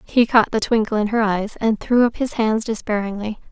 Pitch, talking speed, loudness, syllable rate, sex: 220 Hz, 220 wpm, -19 LUFS, 5.2 syllables/s, female